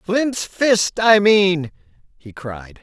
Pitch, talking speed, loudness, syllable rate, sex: 185 Hz, 130 wpm, -16 LUFS, 2.6 syllables/s, male